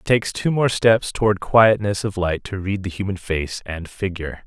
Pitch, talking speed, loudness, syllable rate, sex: 100 Hz, 215 wpm, -20 LUFS, 5.0 syllables/s, male